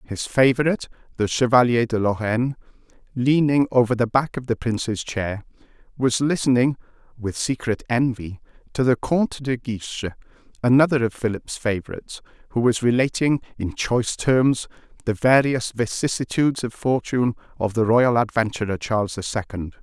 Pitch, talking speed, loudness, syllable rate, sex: 120 Hz, 140 wpm, -21 LUFS, 5.3 syllables/s, male